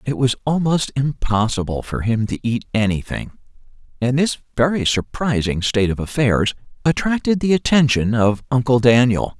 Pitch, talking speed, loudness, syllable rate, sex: 125 Hz, 140 wpm, -19 LUFS, 4.9 syllables/s, male